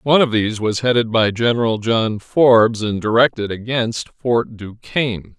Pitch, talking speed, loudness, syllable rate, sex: 115 Hz, 155 wpm, -17 LUFS, 4.7 syllables/s, male